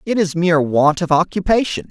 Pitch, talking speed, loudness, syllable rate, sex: 175 Hz, 190 wpm, -16 LUFS, 5.6 syllables/s, male